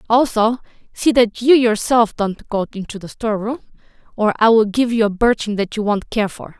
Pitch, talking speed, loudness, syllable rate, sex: 220 Hz, 200 wpm, -17 LUFS, 5.2 syllables/s, female